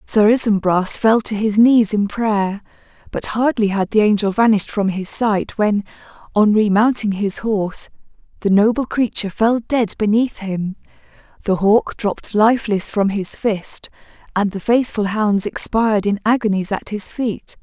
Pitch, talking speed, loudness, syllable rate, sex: 210 Hz, 155 wpm, -17 LUFS, 4.5 syllables/s, female